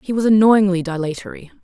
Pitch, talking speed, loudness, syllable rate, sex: 195 Hz, 145 wpm, -16 LUFS, 6.3 syllables/s, female